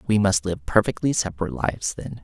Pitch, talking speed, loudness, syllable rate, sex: 100 Hz, 190 wpm, -23 LUFS, 6.3 syllables/s, male